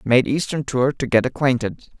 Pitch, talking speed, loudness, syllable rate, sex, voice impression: 130 Hz, 180 wpm, -20 LUFS, 4.9 syllables/s, male, very masculine, adult-like, slightly thick, tensed, slightly powerful, slightly bright, slightly hard, slightly muffled, fluent, cool, slightly intellectual, refreshing, sincere, very calm, slightly mature, friendly, reassuring, unique, slightly elegant, slightly wild, sweet, slightly lively, very kind, very modest